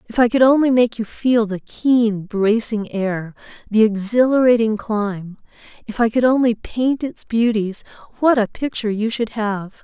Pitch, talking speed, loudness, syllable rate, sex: 225 Hz, 165 wpm, -18 LUFS, 4.4 syllables/s, female